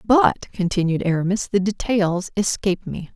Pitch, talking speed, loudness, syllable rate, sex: 195 Hz, 135 wpm, -21 LUFS, 4.9 syllables/s, female